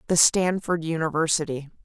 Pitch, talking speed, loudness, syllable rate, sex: 160 Hz, 100 wpm, -23 LUFS, 5.3 syllables/s, female